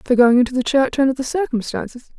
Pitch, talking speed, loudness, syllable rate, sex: 255 Hz, 220 wpm, -18 LUFS, 6.6 syllables/s, female